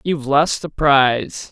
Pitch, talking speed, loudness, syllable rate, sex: 145 Hz, 195 wpm, -16 LUFS, 4.3 syllables/s, male